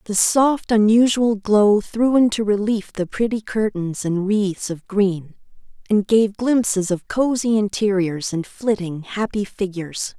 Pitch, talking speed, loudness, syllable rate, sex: 205 Hz, 140 wpm, -19 LUFS, 4.0 syllables/s, female